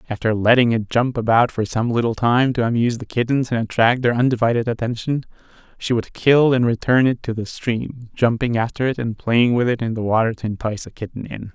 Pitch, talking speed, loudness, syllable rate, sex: 120 Hz, 220 wpm, -19 LUFS, 5.8 syllables/s, male